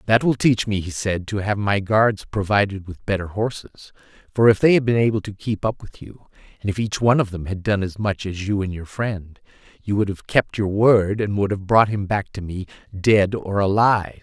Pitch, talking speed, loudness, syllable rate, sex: 105 Hz, 240 wpm, -20 LUFS, 5.2 syllables/s, male